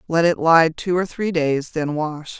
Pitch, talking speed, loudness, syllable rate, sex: 165 Hz, 225 wpm, -19 LUFS, 4.0 syllables/s, female